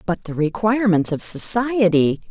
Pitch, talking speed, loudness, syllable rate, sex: 195 Hz, 130 wpm, -18 LUFS, 4.7 syllables/s, female